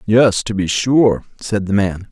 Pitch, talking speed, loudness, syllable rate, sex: 105 Hz, 200 wpm, -16 LUFS, 3.8 syllables/s, male